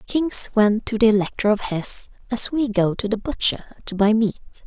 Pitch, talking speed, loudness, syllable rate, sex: 220 Hz, 205 wpm, -20 LUFS, 5.1 syllables/s, female